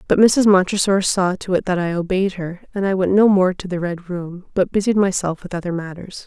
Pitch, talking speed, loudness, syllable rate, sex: 185 Hz, 240 wpm, -18 LUFS, 5.4 syllables/s, female